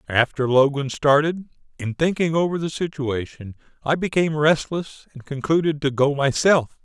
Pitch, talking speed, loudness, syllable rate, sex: 145 Hz, 140 wpm, -21 LUFS, 4.9 syllables/s, male